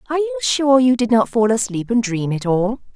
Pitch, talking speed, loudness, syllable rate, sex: 240 Hz, 245 wpm, -17 LUFS, 5.6 syllables/s, female